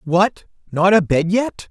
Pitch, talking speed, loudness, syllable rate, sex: 185 Hz, 140 wpm, -17 LUFS, 3.7 syllables/s, male